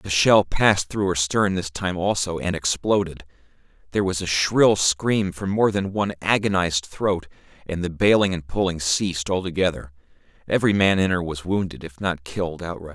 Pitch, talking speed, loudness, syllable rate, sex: 90 Hz, 180 wpm, -22 LUFS, 5.2 syllables/s, male